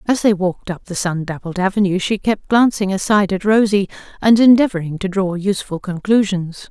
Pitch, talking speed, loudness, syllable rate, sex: 195 Hz, 180 wpm, -17 LUFS, 5.6 syllables/s, female